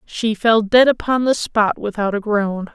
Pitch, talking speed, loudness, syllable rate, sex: 215 Hz, 195 wpm, -17 LUFS, 4.2 syllables/s, female